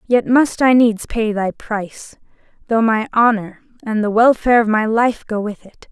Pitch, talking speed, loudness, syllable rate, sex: 225 Hz, 195 wpm, -16 LUFS, 4.6 syllables/s, female